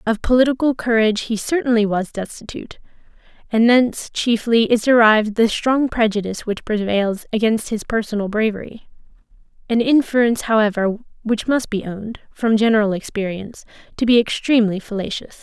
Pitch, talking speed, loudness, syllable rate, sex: 220 Hz, 135 wpm, -18 LUFS, 5.8 syllables/s, female